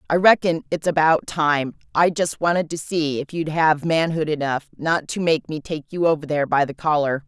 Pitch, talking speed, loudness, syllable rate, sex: 155 Hz, 215 wpm, -21 LUFS, 5.1 syllables/s, female